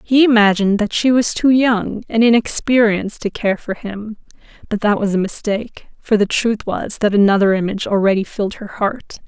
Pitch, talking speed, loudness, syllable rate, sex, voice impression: 215 Hz, 190 wpm, -16 LUFS, 5.3 syllables/s, female, slightly young, slightly adult-like, very thin, tensed, slightly powerful, bright, hard, clear, fluent, cool, very intellectual, refreshing, very sincere, calm, friendly, reassuring, unique, very elegant, sweet, lively, kind, slightly light